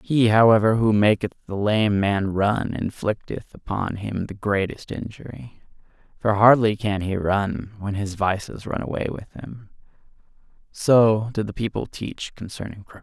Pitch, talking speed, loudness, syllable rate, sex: 105 Hz, 145 wpm, -22 LUFS, 4.4 syllables/s, male